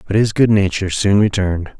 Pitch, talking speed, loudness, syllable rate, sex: 100 Hz, 200 wpm, -16 LUFS, 6.1 syllables/s, male